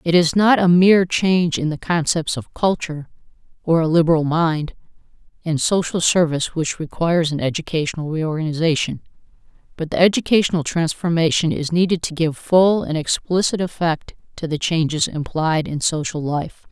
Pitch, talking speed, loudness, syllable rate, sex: 165 Hz, 145 wpm, -19 LUFS, 5.3 syllables/s, female